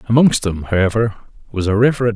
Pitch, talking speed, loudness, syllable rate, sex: 110 Hz, 165 wpm, -16 LUFS, 5.8 syllables/s, male